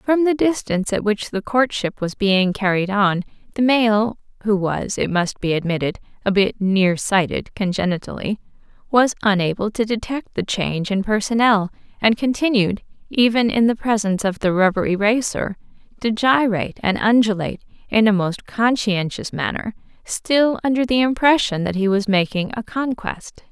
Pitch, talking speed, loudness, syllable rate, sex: 210 Hz, 155 wpm, -19 LUFS, 4.3 syllables/s, female